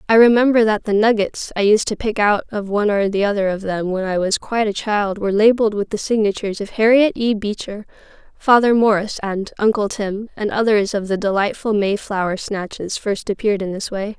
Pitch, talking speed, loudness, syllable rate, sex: 210 Hz, 210 wpm, -18 LUFS, 5.6 syllables/s, female